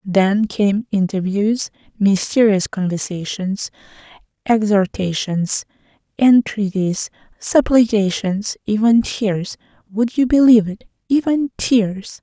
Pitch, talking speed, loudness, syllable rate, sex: 210 Hz, 75 wpm, -17 LUFS, 3.6 syllables/s, female